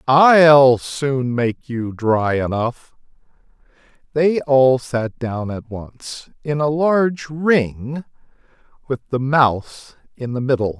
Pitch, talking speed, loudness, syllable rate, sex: 130 Hz, 120 wpm, -17 LUFS, 3.2 syllables/s, male